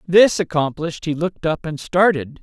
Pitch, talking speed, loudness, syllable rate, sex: 165 Hz, 175 wpm, -19 LUFS, 5.2 syllables/s, male